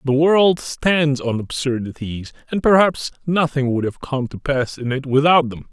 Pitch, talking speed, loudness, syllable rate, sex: 140 Hz, 180 wpm, -19 LUFS, 4.4 syllables/s, male